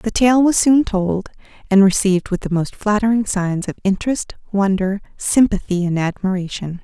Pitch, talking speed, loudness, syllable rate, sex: 200 Hz, 160 wpm, -17 LUFS, 5.1 syllables/s, female